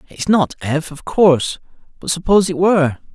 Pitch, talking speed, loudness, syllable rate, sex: 170 Hz, 170 wpm, -16 LUFS, 5.5 syllables/s, male